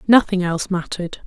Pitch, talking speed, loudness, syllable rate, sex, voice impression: 185 Hz, 145 wpm, -20 LUFS, 6.3 syllables/s, female, feminine, adult-like, slightly soft, slightly muffled, calm, reassuring, slightly elegant